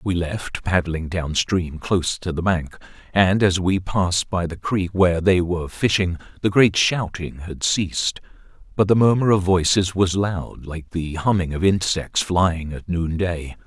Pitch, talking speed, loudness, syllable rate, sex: 90 Hz, 170 wpm, -21 LUFS, 4.3 syllables/s, male